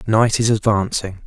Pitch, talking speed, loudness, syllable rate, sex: 105 Hz, 140 wpm, -18 LUFS, 4.4 syllables/s, male